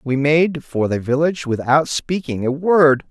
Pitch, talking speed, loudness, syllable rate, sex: 145 Hz, 175 wpm, -18 LUFS, 4.3 syllables/s, male